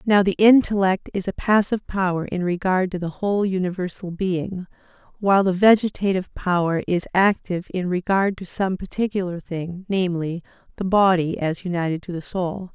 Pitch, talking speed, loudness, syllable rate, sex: 185 Hz, 160 wpm, -21 LUFS, 5.3 syllables/s, female